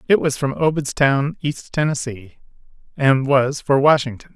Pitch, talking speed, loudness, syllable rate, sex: 135 Hz, 140 wpm, -19 LUFS, 4.6 syllables/s, male